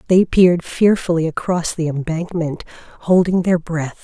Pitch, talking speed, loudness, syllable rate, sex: 170 Hz, 135 wpm, -17 LUFS, 4.6 syllables/s, female